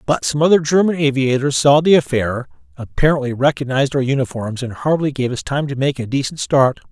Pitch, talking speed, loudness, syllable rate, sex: 140 Hz, 190 wpm, -17 LUFS, 5.8 syllables/s, male